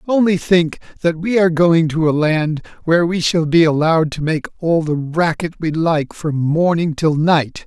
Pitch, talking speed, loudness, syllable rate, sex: 165 Hz, 195 wpm, -16 LUFS, 4.6 syllables/s, male